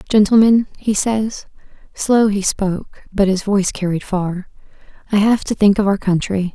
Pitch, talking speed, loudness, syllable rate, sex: 200 Hz, 145 wpm, -17 LUFS, 4.8 syllables/s, female